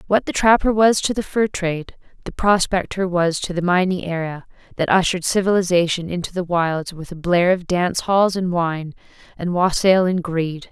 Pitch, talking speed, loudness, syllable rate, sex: 180 Hz, 185 wpm, -19 LUFS, 5.1 syllables/s, female